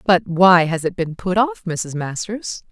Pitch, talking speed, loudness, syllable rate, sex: 185 Hz, 200 wpm, -18 LUFS, 4.1 syllables/s, female